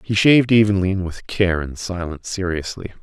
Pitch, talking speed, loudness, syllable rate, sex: 95 Hz, 180 wpm, -19 LUFS, 5.6 syllables/s, male